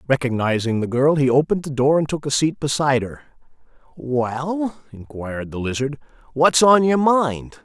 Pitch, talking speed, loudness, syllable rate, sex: 140 Hz, 165 wpm, -19 LUFS, 5.0 syllables/s, male